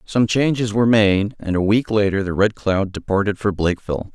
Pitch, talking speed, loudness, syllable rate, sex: 105 Hz, 205 wpm, -19 LUFS, 5.5 syllables/s, male